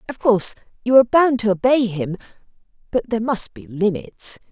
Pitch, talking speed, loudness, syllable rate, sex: 220 Hz, 160 wpm, -19 LUFS, 5.7 syllables/s, female